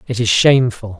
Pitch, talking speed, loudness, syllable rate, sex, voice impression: 115 Hz, 180 wpm, -14 LUFS, 6.0 syllables/s, male, masculine, adult-like, slightly relaxed, slightly bright, soft, raspy, intellectual, calm, friendly, slightly reassuring, slightly wild, lively, slightly kind